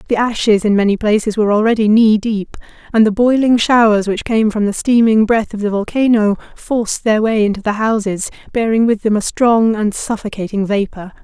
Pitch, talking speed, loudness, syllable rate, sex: 215 Hz, 190 wpm, -14 LUFS, 5.4 syllables/s, female